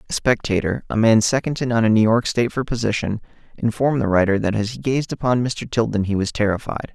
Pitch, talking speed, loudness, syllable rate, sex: 115 Hz, 225 wpm, -20 LUFS, 6.2 syllables/s, male